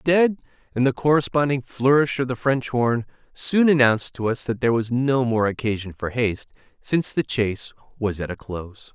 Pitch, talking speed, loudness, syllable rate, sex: 125 Hz, 180 wpm, -22 LUFS, 5.4 syllables/s, male